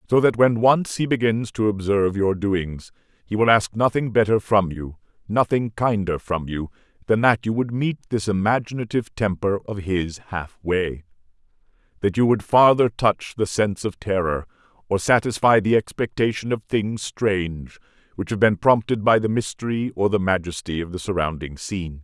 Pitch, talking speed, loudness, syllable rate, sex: 105 Hz, 170 wpm, -21 LUFS, 5.0 syllables/s, male